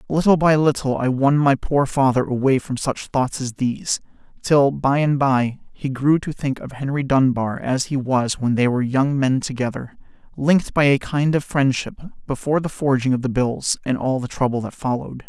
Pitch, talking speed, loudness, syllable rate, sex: 135 Hz, 205 wpm, -20 LUFS, 5.1 syllables/s, male